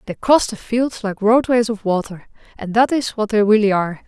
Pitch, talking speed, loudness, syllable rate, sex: 220 Hz, 220 wpm, -17 LUFS, 5.3 syllables/s, female